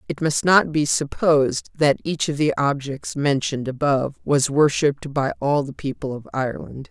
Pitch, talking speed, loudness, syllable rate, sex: 145 Hz, 175 wpm, -21 LUFS, 5.0 syllables/s, female